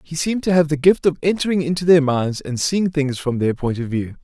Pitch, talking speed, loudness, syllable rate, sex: 155 Hz, 270 wpm, -19 LUFS, 5.7 syllables/s, male